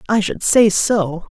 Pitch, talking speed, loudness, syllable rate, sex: 200 Hz, 175 wpm, -16 LUFS, 3.7 syllables/s, female